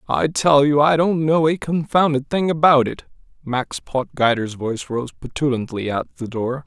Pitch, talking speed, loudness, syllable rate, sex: 140 Hz, 170 wpm, -19 LUFS, 4.7 syllables/s, male